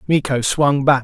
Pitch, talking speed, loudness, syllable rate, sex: 140 Hz, 175 wpm, -17 LUFS, 4.4 syllables/s, male